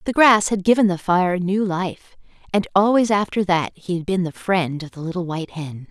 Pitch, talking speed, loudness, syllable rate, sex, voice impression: 185 Hz, 225 wpm, -20 LUFS, 5.1 syllables/s, female, feminine, adult-like, clear, slightly cute, slightly unique, lively